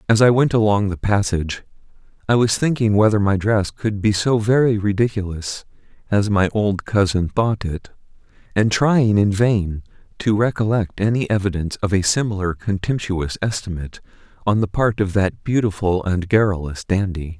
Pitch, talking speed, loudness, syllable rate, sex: 100 Hz, 155 wpm, -19 LUFS, 5.0 syllables/s, male